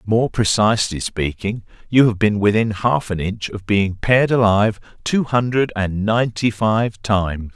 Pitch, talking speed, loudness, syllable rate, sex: 105 Hz, 160 wpm, -18 LUFS, 4.6 syllables/s, male